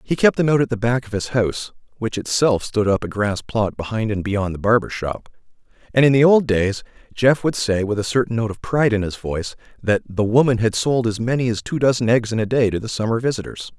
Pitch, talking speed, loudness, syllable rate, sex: 115 Hz, 245 wpm, -19 LUFS, 5.8 syllables/s, male